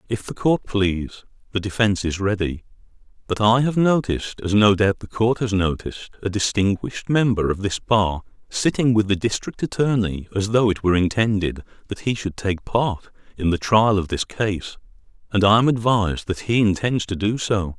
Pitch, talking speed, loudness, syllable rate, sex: 105 Hz, 190 wpm, -21 LUFS, 5.3 syllables/s, male